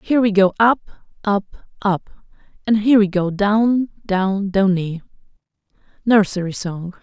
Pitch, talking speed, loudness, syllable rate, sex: 200 Hz, 130 wpm, -18 LUFS, 4.6 syllables/s, female